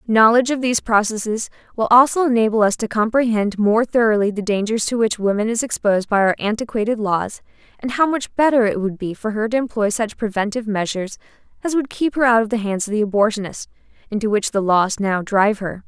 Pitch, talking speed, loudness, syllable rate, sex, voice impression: 220 Hz, 210 wpm, -18 LUFS, 6.0 syllables/s, female, very feminine, young, very thin, tensed, slightly weak, very bright, soft, very clear, very fluent, cute, intellectual, very refreshing, sincere, slightly calm, friendly, reassuring, unique, slightly elegant, wild, slightly sweet, lively, kind, slightly intense, slightly sharp, light